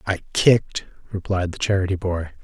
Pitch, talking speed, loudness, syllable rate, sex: 95 Hz, 150 wpm, -21 LUFS, 5.7 syllables/s, male